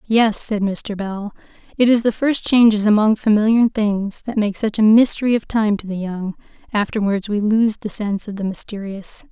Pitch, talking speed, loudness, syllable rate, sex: 210 Hz, 195 wpm, -18 LUFS, 5.0 syllables/s, female